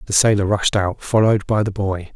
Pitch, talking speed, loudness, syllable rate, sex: 100 Hz, 225 wpm, -18 LUFS, 5.6 syllables/s, male